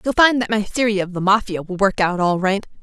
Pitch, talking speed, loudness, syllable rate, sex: 200 Hz, 275 wpm, -18 LUFS, 5.7 syllables/s, female